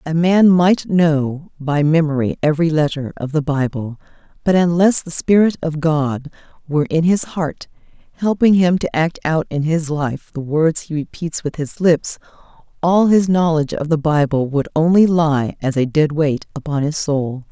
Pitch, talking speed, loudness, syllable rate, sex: 155 Hz, 180 wpm, -17 LUFS, 4.5 syllables/s, female